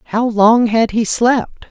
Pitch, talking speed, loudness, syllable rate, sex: 230 Hz, 175 wpm, -14 LUFS, 3.5 syllables/s, female